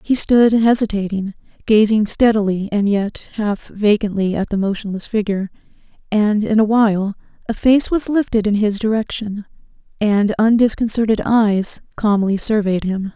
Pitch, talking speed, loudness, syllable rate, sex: 210 Hz, 135 wpm, -17 LUFS, 4.7 syllables/s, female